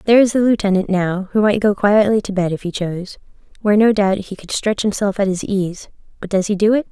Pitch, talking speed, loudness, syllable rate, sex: 200 Hz, 250 wpm, -17 LUFS, 6.0 syllables/s, female